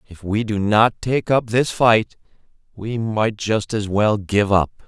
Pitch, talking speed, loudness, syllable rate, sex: 105 Hz, 185 wpm, -19 LUFS, 3.8 syllables/s, male